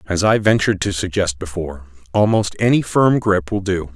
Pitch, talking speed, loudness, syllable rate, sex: 95 Hz, 180 wpm, -18 LUFS, 5.4 syllables/s, male